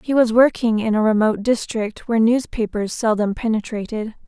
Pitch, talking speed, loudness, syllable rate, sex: 225 Hz, 155 wpm, -19 LUFS, 5.4 syllables/s, female